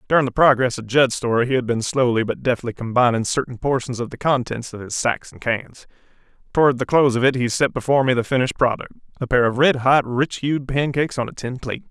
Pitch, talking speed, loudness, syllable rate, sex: 125 Hz, 230 wpm, -20 LUFS, 6.2 syllables/s, male